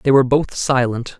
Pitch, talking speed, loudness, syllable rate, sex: 130 Hz, 200 wpm, -17 LUFS, 5.2 syllables/s, male